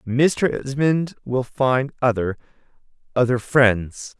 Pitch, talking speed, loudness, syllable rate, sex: 130 Hz, 85 wpm, -20 LUFS, 3.2 syllables/s, male